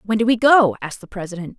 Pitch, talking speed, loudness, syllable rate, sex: 210 Hz, 265 wpm, -15 LUFS, 6.9 syllables/s, female